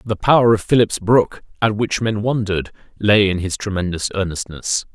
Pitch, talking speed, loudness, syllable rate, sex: 105 Hz, 170 wpm, -18 LUFS, 5.1 syllables/s, male